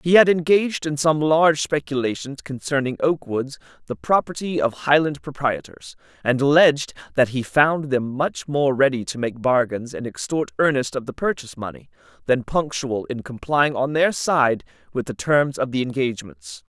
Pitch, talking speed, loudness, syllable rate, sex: 135 Hz, 170 wpm, -21 LUFS, 4.9 syllables/s, male